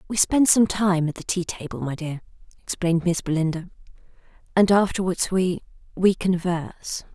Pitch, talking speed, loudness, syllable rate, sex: 180 Hz, 145 wpm, -23 LUFS, 5.2 syllables/s, female